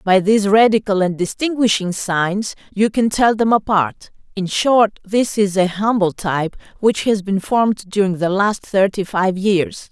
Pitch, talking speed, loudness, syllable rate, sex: 200 Hz, 170 wpm, -17 LUFS, 4.4 syllables/s, female